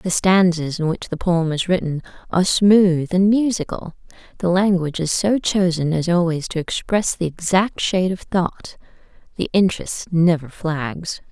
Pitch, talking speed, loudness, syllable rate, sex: 175 Hz, 160 wpm, -19 LUFS, 4.6 syllables/s, female